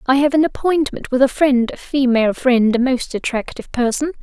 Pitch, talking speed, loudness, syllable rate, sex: 260 Hz, 185 wpm, -17 LUFS, 5.5 syllables/s, female